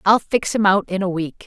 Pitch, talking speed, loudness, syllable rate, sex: 195 Hz, 285 wpm, -19 LUFS, 5.1 syllables/s, female